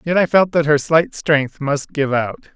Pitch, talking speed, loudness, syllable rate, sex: 150 Hz, 235 wpm, -17 LUFS, 4.1 syllables/s, male